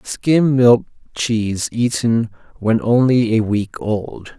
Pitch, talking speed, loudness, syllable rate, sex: 115 Hz, 125 wpm, -17 LUFS, 3.3 syllables/s, male